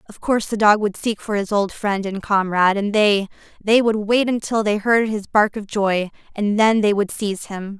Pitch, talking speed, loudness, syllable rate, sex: 210 Hz, 225 wpm, -19 LUFS, 5.0 syllables/s, female